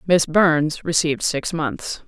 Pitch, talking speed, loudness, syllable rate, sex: 160 Hz, 145 wpm, -20 LUFS, 3.6 syllables/s, female